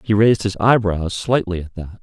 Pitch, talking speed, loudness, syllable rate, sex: 100 Hz, 205 wpm, -18 LUFS, 5.3 syllables/s, male